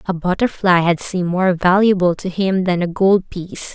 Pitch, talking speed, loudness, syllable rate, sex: 185 Hz, 190 wpm, -16 LUFS, 5.0 syllables/s, female